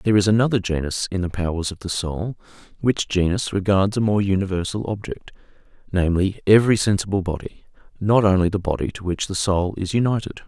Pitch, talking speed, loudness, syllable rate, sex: 95 Hz, 170 wpm, -21 LUFS, 6.1 syllables/s, male